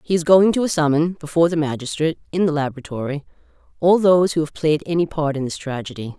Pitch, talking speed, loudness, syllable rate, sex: 155 Hz, 205 wpm, -19 LUFS, 6.5 syllables/s, female